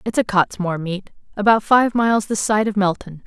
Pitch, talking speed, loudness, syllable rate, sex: 205 Hz, 185 wpm, -18 LUFS, 5.8 syllables/s, female